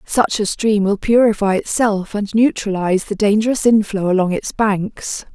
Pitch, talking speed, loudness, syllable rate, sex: 210 Hz, 155 wpm, -17 LUFS, 4.6 syllables/s, female